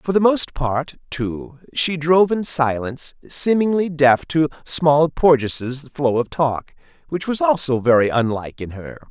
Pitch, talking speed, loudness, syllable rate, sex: 145 Hz, 160 wpm, -19 LUFS, 4.2 syllables/s, male